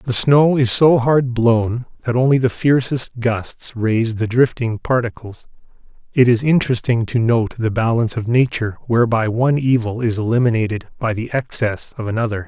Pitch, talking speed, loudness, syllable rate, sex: 120 Hz, 160 wpm, -17 LUFS, 5.2 syllables/s, male